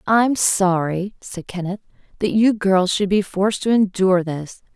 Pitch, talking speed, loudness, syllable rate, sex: 195 Hz, 165 wpm, -19 LUFS, 4.4 syllables/s, female